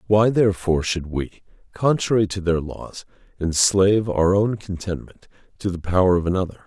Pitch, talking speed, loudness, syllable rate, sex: 95 Hz, 155 wpm, -21 LUFS, 5.2 syllables/s, male